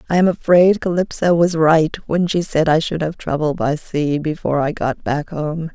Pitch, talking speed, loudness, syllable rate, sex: 160 Hz, 210 wpm, -17 LUFS, 4.7 syllables/s, female